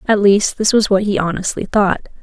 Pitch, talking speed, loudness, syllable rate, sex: 200 Hz, 215 wpm, -15 LUFS, 5.4 syllables/s, female